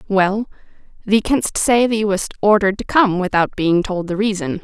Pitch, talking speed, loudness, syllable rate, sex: 200 Hz, 180 wpm, -17 LUFS, 4.8 syllables/s, female